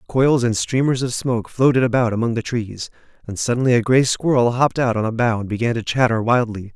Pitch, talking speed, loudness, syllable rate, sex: 120 Hz, 220 wpm, -19 LUFS, 5.9 syllables/s, male